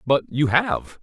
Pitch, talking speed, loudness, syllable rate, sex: 145 Hz, 175 wpm, -21 LUFS, 3.6 syllables/s, male